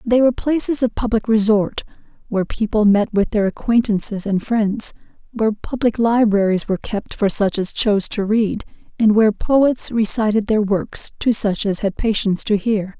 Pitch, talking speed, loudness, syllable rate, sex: 215 Hz, 175 wpm, -18 LUFS, 5.0 syllables/s, female